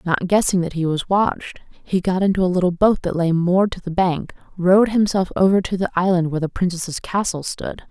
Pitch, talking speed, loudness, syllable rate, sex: 180 Hz, 220 wpm, -19 LUFS, 5.6 syllables/s, female